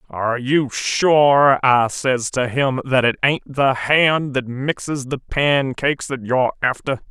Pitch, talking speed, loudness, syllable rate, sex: 135 Hz, 160 wpm, -18 LUFS, 3.8 syllables/s, male